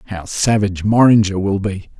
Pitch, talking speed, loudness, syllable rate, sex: 100 Hz, 150 wpm, -16 LUFS, 5.3 syllables/s, male